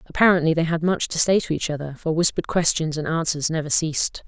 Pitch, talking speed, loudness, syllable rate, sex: 160 Hz, 225 wpm, -21 LUFS, 6.3 syllables/s, female